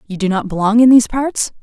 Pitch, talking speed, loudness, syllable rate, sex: 220 Hz, 260 wpm, -13 LUFS, 6.3 syllables/s, female